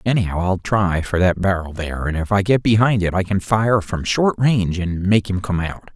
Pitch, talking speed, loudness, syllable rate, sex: 95 Hz, 240 wpm, -19 LUFS, 5.2 syllables/s, male